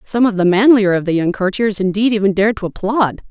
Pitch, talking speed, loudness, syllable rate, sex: 205 Hz, 235 wpm, -15 LUFS, 6.0 syllables/s, female